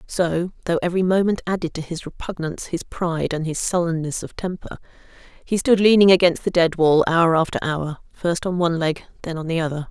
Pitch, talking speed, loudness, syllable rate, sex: 170 Hz, 200 wpm, -21 LUFS, 5.8 syllables/s, female